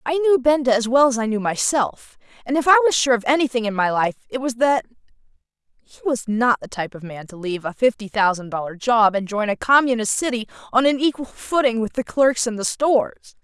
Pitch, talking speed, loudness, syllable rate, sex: 240 Hz, 230 wpm, -20 LUFS, 5.8 syllables/s, female